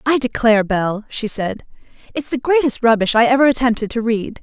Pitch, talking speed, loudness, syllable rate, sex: 235 Hz, 190 wpm, -16 LUFS, 5.6 syllables/s, female